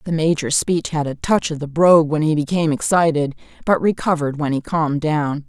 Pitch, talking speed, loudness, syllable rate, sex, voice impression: 155 Hz, 210 wpm, -18 LUFS, 5.8 syllables/s, female, feminine, very adult-like, slightly fluent, slightly intellectual, slightly elegant